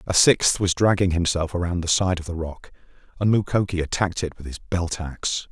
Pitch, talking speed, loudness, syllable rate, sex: 90 Hz, 205 wpm, -22 LUFS, 5.3 syllables/s, male